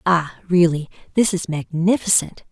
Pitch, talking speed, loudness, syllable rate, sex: 175 Hz, 120 wpm, -19 LUFS, 4.6 syllables/s, female